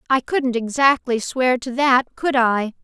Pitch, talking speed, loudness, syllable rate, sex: 250 Hz, 170 wpm, -19 LUFS, 3.9 syllables/s, female